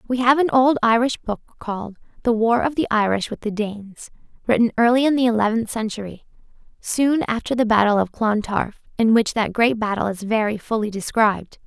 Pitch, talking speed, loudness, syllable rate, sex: 225 Hz, 185 wpm, -20 LUFS, 5.5 syllables/s, female